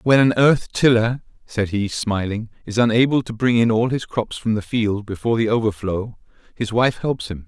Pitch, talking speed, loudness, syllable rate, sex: 115 Hz, 200 wpm, -20 LUFS, 5.0 syllables/s, male